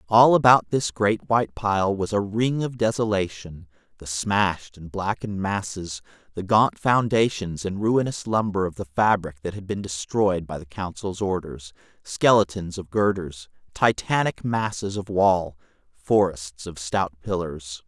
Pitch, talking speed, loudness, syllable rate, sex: 100 Hz, 150 wpm, -23 LUFS, 4.3 syllables/s, male